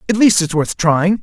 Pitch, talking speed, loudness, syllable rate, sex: 185 Hz, 245 wpm, -14 LUFS, 4.8 syllables/s, male